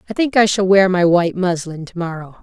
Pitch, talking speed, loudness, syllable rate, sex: 185 Hz, 225 wpm, -16 LUFS, 6.0 syllables/s, female